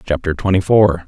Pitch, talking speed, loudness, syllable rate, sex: 90 Hz, 165 wpm, -15 LUFS, 5.3 syllables/s, male